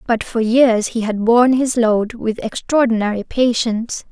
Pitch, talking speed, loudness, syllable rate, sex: 230 Hz, 160 wpm, -16 LUFS, 4.6 syllables/s, female